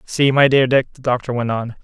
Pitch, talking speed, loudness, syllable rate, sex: 130 Hz, 260 wpm, -17 LUFS, 5.7 syllables/s, male